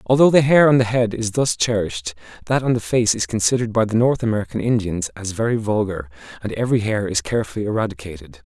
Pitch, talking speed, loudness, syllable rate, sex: 110 Hz, 205 wpm, -19 LUFS, 6.6 syllables/s, male